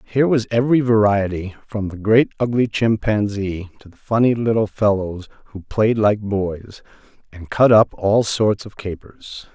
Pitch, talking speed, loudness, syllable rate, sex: 105 Hz, 155 wpm, -18 LUFS, 4.5 syllables/s, male